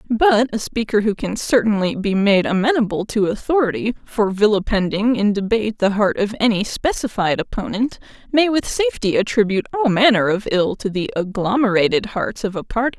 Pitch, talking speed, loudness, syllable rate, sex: 215 Hz, 165 wpm, -18 LUFS, 5.4 syllables/s, female